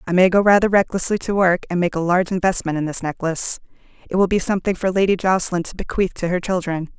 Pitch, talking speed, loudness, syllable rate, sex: 180 Hz, 230 wpm, -19 LUFS, 6.8 syllables/s, female